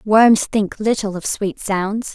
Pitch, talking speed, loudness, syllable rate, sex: 205 Hz, 170 wpm, -18 LUFS, 3.4 syllables/s, female